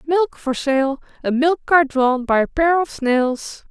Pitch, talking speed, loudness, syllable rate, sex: 285 Hz, 195 wpm, -18 LUFS, 3.6 syllables/s, female